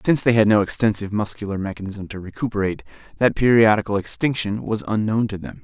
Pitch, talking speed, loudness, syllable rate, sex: 105 Hz, 170 wpm, -20 LUFS, 6.6 syllables/s, male